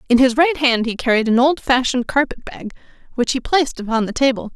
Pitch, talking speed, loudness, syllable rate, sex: 255 Hz, 210 wpm, -17 LUFS, 6.1 syllables/s, female